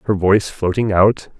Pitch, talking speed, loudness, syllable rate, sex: 100 Hz, 170 wpm, -16 LUFS, 5.1 syllables/s, male